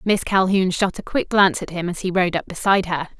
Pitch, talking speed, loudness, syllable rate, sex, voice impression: 185 Hz, 265 wpm, -20 LUFS, 6.0 syllables/s, female, feminine, adult-like, very fluent, intellectual, slightly refreshing